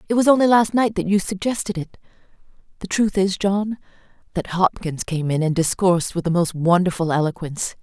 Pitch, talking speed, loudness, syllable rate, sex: 185 Hz, 185 wpm, -20 LUFS, 5.6 syllables/s, female